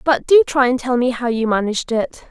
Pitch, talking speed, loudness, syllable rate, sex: 250 Hz, 260 wpm, -17 LUFS, 5.6 syllables/s, female